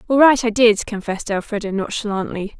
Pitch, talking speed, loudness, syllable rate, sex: 215 Hz, 160 wpm, -18 LUFS, 5.8 syllables/s, female